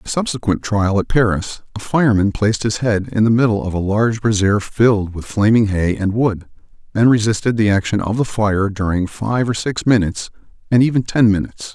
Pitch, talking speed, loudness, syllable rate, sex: 110 Hz, 205 wpm, -17 LUFS, 5.6 syllables/s, male